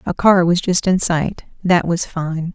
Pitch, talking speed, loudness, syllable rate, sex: 175 Hz, 190 wpm, -17 LUFS, 4.1 syllables/s, female